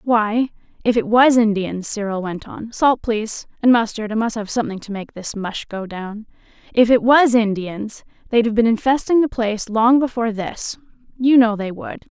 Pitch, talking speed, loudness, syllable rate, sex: 225 Hz, 190 wpm, -18 LUFS, 5.0 syllables/s, female